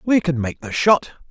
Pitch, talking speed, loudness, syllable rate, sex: 155 Hz, 230 wpm, -19 LUFS, 4.9 syllables/s, male